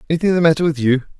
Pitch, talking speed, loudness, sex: 155 Hz, 250 wpm, -16 LUFS, male